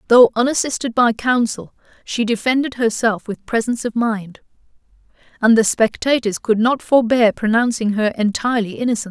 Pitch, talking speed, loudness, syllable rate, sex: 230 Hz, 140 wpm, -17 LUFS, 5.2 syllables/s, female